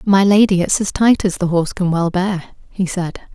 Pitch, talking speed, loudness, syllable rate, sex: 185 Hz, 250 wpm, -16 LUFS, 5.6 syllables/s, female